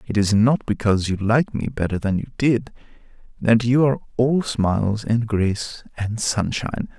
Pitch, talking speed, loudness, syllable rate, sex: 115 Hz, 170 wpm, -21 LUFS, 5.0 syllables/s, male